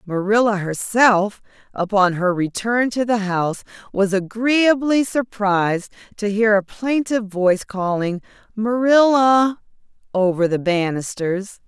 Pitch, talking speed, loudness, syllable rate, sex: 210 Hz, 110 wpm, -19 LUFS, 4.1 syllables/s, female